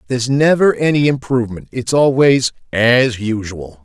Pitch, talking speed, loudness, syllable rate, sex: 125 Hz, 110 wpm, -15 LUFS, 4.7 syllables/s, male